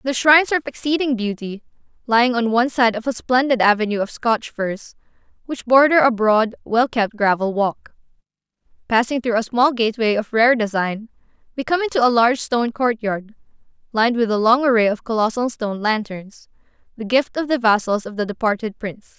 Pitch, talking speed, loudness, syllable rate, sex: 230 Hz, 180 wpm, -18 LUFS, 5.6 syllables/s, female